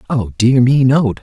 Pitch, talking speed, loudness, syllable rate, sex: 125 Hz, 245 wpm, -13 LUFS, 4.9 syllables/s, male